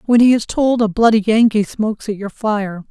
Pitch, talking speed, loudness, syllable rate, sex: 215 Hz, 225 wpm, -16 LUFS, 5.1 syllables/s, female